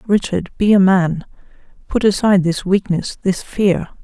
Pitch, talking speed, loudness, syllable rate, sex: 190 Hz, 150 wpm, -16 LUFS, 4.6 syllables/s, female